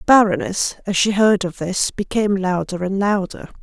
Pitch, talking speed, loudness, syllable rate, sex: 195 Hz, 180 wpm, -19 LUFS, 5.3 syllables/s, female